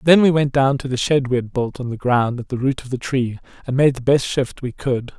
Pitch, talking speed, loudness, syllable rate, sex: 130 Hz, 300 wpm, -19 LUFS, 5.4 syllables/s, male